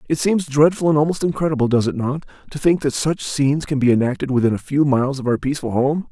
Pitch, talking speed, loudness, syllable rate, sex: 140 Hz, 225 wpm, -19 LUFS, 6.6 syllables/s, male